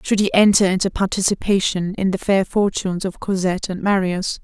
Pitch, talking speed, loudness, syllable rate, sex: 190 Hz, 175 wpm, -19 LUFS, 5.5 syllables/s, female